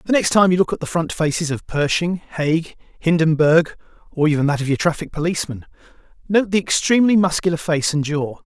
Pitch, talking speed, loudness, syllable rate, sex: 165 Hz, 190 wpm, -18 LUFS, 5.8 syllables/s, male